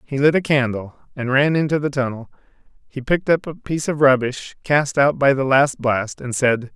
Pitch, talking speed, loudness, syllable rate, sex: 135 Hz, 215 wpm, -19 LUFS, 5.2 syllables/s, male